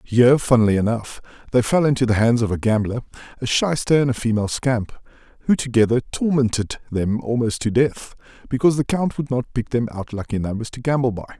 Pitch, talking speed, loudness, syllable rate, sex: 120 Hz, 195 wpm, -20 LUFS, 5.9 syllables/s, male